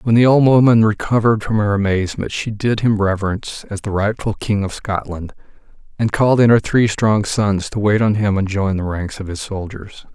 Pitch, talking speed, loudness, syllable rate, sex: 105 Hz, 215 wpm, -17 LUFS, 5.4 syllables/s, male